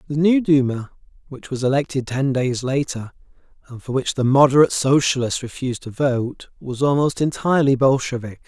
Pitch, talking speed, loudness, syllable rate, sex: 135 Hz, 155 wpm, -19 LUFS, 5.4 syllables/s, male